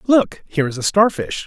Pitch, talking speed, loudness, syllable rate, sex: 170 Hz, 205 wpm, -18 LUFS, 5.4 syllables/s, male